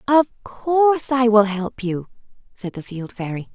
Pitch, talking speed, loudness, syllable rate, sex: 230 Hz, 170 wpm, -20 LUFS, 4.1 syllables/s, female